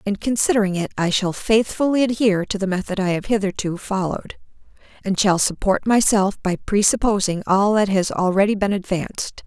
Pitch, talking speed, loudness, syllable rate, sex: 200 Hz, 165 wpm, -20 LUFS, 5.5 syllables/s, female